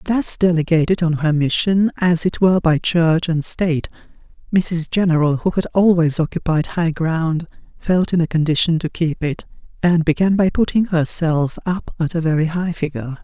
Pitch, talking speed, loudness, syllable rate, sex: 165 Hz, 170 wpm, -18 LUFS, 5.0 syllables/s, female